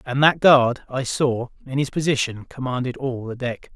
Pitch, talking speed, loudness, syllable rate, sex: 130 Hz, 190 wpm, -21 LUFS, 4.8 syllables/s, male